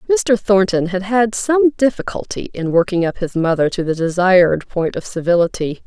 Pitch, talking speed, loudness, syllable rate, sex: 190 Hz, 175 wpm, -17 LUFS, 5.0 syllables/s, female